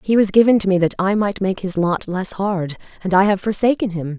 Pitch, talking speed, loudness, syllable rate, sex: 195 Hz, 260 wpm, -18 LUFS, 5.5 syllables/s, female